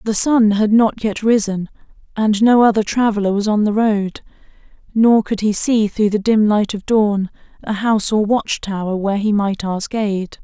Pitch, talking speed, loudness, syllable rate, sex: 210 Hz, 195 wpm, -16 LUFS, 4.7 syllables/s, female